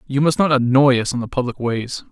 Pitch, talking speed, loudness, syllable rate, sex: 130 Hz, 255 wpm, -18 LUFS, 5.7 syllables/s, male